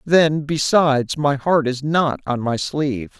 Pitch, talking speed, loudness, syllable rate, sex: 145 Hz, 170 wpm, -19 LUFS, 4.0 syllables/s, male